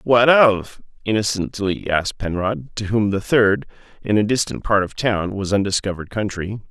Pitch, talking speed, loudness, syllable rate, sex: 105 Hz, 145 wpm, -19 LUFS, 4.9 syllables/s, male